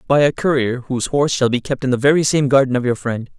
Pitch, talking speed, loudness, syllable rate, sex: 130 Hz, 285 wpm, -17 LUFS, 6.6 syllables/s, male